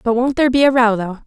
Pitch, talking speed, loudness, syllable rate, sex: 240 Hz, 330 wpm, -15 LUFS, 7.2 syllables/s, female